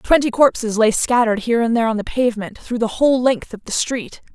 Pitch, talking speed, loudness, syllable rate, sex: 235 Hz, 235 wpm, -18 LUFS, 6.2 syllables/s, female